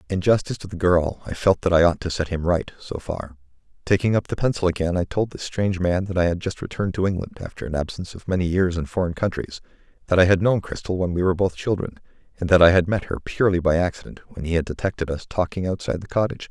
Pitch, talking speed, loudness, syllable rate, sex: 90 Hz, 245 wpm, -22 LUFS, 6.7 syllables/s, male